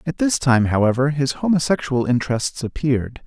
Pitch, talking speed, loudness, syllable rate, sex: 135 Hz, 145 wpm, -19 LUFS, 5.4 syllables/s, male